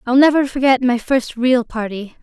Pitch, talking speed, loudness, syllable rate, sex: 250 Hz, 190 wpm, -16 LUFS, 4.8 syllables/s, female